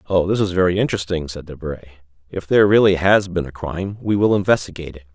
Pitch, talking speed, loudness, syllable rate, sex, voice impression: 90 Hz, 210 wpm, -18 LUFS, 6.8 syllables/s, male, masculine, middle-aged, powerful, slightly dark, hard, muffled, slightly raspy, calm, mature, wild, strict